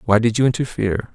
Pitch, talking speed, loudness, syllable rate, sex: 115 Hz, 210 wpm, -19 LUFS, 6.9 syllables/s, male